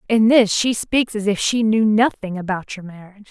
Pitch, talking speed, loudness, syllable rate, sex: 210 Hz, 220 wpm, -18 LUFS, 5.1 syllables/s, female